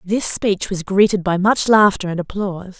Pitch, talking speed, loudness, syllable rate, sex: 195 Hz, 195 wpm, -17 LUFS, 4.8 syllables/s, female